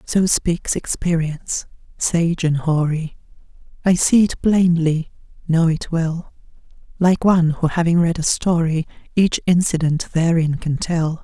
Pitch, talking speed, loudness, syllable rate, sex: 165 Hz, 135 wpm, -18 LUFS, 4.1 syllables/s, female